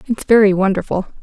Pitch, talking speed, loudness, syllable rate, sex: 200 Hz, 145 wpm, -15 LUFS, 6.3 syllables/s, female